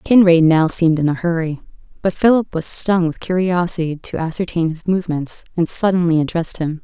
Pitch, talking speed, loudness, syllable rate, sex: 170 Hz, 175 wpm, -17 LUFS, 5.6 syllables/s, female